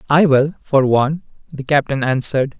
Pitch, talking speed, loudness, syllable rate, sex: 140 Hz, 160 wpm, -16 LUFS, 5.4 syllables/s, male